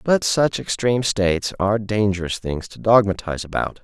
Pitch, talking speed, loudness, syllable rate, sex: 105 Hz, 155 wpm, -20 LUFS, 5.4 syllables/s, male